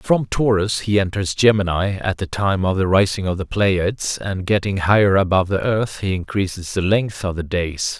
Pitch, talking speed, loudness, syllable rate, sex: 95 Hz, 205 wpm, -19 LUFS, 4.9 syllables/s, male